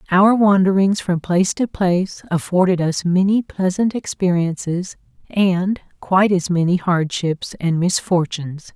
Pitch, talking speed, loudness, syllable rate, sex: 185 Hz, 125 wpm, -18 LUFS, 4.4 syllables/s, female